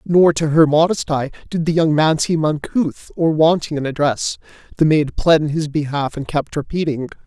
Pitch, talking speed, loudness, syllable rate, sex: 155 Hz, 200 wpm, -17 LUFS, 4.9 syllables/s, male